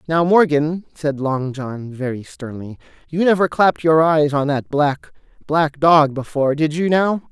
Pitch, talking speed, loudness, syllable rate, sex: 150 Hz, 165 wpm, -17 LUFS, 4.4 syllables/s, male